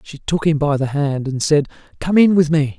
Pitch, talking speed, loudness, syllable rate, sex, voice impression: 150 Hz, 260 wpm, -17 LUFS, 5.1 syllables/s, male, masculine, adult-like, slightly soft, slightly calm, friendly, kind